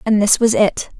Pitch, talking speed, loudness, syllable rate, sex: 215 Hz, 240 wpm, -15 LUFS, 4.9 syllables/s, female